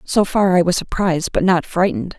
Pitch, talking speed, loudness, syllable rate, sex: 180 Hz, 220 wpm, -17 LUFS, 5.9 syllables/s, female